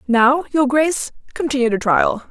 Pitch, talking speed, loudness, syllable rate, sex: 265 Hz, 155 wpm, -17 LUFS, 4.8 syllables/s, female